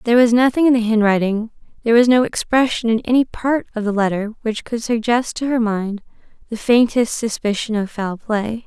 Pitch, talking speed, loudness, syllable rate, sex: 230 Hz, 195 wpm, -18 LUFS, 5.4 syllables/s, female